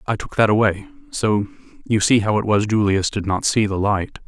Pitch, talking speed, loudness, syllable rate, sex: 105 Hz, 225 wpm, -19 LUFS, 5.2 syllables/s, male